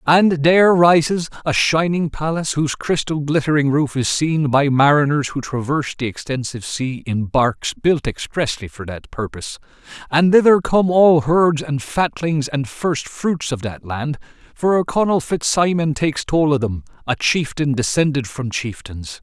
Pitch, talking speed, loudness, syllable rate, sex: 145 Hz, 155 wpm, -18 LUFS, 4.6 syllables/s, male